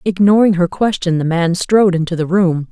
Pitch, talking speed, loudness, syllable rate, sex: 180 Hz, 200 wpm, -14 LUFS, 5.4 syllables/s, female